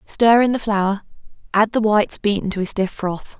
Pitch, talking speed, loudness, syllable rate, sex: 210 Hz, 210 wpm, -19 LUFS, 5.0 syllables/s, female